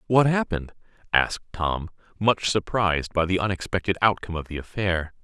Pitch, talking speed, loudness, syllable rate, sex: 95 Hz, 150 wpm, -24 LUFS, 5.7 syllables/s, male